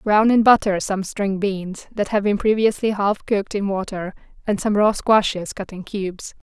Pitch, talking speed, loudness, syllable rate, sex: 200 Hz, 190 wpm, -20 LUFS, 4.7 syllables/s, female